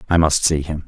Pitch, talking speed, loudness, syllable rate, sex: 80 Hz, 275 wpm, -17 LUFS, 6.0 syllables/s, male